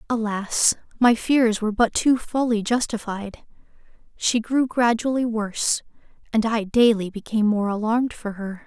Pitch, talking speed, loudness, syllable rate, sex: 225 Hz, 130 wpm, -22 LUFS, 4.7 syllables/s, female